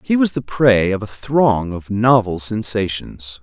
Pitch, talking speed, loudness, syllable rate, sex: 110 Hz, 175 wpm, -17 LUFS, 3.9 syllables/s, male